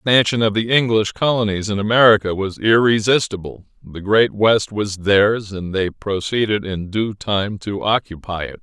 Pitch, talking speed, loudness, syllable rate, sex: 105 Hz, 165 wpm, -18 LUFS, 4.9 syllables/s, male